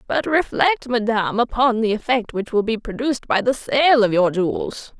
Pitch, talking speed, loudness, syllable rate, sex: 235 Hz, 190 wpm, -19 LUFS, 5.0 syllables/s, female